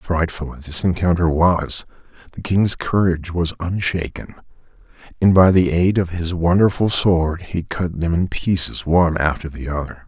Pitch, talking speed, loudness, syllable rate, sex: 85 Hz, 160 wpm, -19 LUFS, 4.6 syllables/s, male